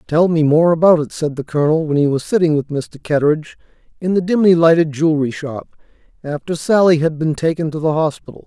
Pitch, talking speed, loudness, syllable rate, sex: 160 Hz, 205 wpm, -16 LUFS, 6.0 syllables/s, male